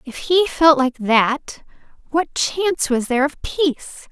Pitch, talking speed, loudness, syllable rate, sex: 290 Hz, 160 wpm, -18 LUFS, 4.0 syllables/s, female